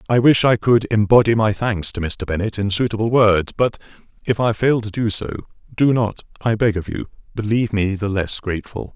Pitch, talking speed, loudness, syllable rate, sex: 105 Hz, 210 wpm, -19 LUFS, 5.2 syllables/s, male